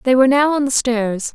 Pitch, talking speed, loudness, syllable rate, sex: 255 Hz, 270 wpm, -16 LUFS, 5.7 syllables/s, female